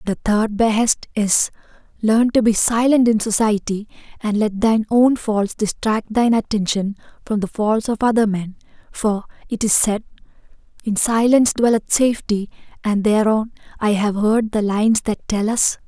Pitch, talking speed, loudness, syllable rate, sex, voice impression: 215 Hz, 155 wpm, -18 LUFS, 4.7 syllables/s, female, feminine, adult-like, slightly relaxed, bright, soft, raspy, intellectual, calm, slightly friendly, lively, slightly modest